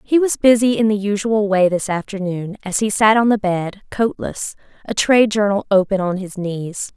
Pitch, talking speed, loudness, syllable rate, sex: 205 Hz, 200 wpm, -18 LUFS, 4.9 syllables/s, female